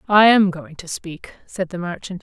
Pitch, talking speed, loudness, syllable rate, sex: 185 Hz, 215 wpm, -19 LUFS, 4.4 syllables/s, female